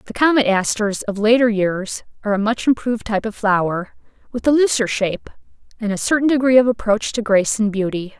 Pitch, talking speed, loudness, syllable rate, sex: 220 Hz, 200 wpm, -18 LUFS, 6.0 syllables/s, female